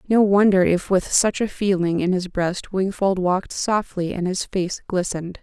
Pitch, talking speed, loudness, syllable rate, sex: 190 Hz, 190 wpm, -21 LUFS, 4.6 syllables/s, female